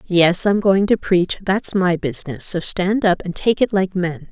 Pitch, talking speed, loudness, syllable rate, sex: 185 Hz, 225 wpm, -18 LUFS, 4.3 syllables/s, female